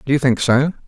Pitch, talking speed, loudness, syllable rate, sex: 135 Hz, 275 wpm, -16 LUFS, 6.3 syllables/s, male